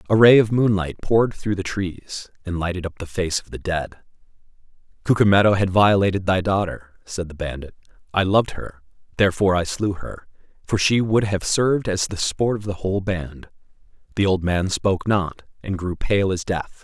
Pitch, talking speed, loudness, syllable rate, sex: 95 Hz, 185 wpm, -21 LUFS, 5.2 syllables/s, male